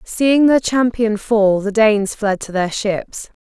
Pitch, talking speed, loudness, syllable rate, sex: 215 Hz, 175 wpm, -16 LUFS, 3.7 syllables/s, female